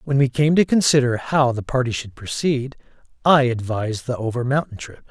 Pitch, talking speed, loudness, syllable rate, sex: 125 Hz, 190 wpm, -20 LUFS, 5.4 syllables/s, male